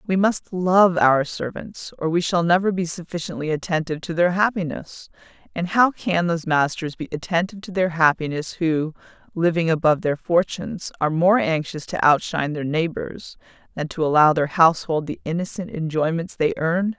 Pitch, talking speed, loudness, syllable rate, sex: 165 Hz, 165 wpm, -21 LUFS, 5.3 syllables/s, female